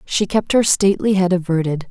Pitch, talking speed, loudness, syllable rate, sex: 185 Hz, 190 wpm, -17 LUFS, 5.5 syllables/s, female